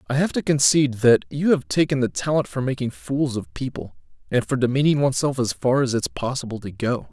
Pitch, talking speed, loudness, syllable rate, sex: 130 Hz, 220 wpm, -21 LUFS, 5.8 syllables/s, male